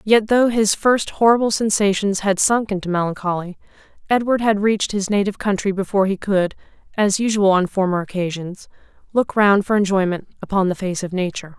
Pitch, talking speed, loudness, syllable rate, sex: 200 Hz, 170 wpm, -19 LUFS, 5.7 syllables/s, female